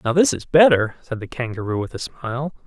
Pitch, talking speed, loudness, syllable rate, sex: 135 Hz, 225 wpm, -20 LUFS, 5.8 syllables/s, male